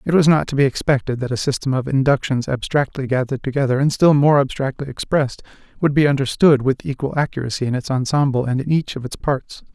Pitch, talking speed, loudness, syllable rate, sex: 135 Hz, 210 wpm, -19 LUFS, 6.3 syllables/s, male